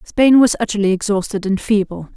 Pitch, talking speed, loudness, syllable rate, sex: 205 Hz, 165 wpm, -16 LUFS, 5.6 syllables/s, female